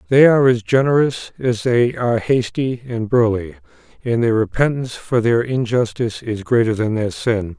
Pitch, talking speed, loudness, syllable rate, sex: 120 Hz, 165 wpm, -18 LUFS, 5.0 syllables/s, male